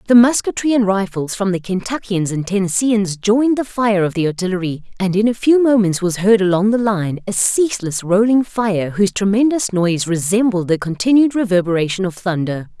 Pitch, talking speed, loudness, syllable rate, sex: 200 Hz, 180 wpm, -16 LUFS, 5.4 syllables/s, female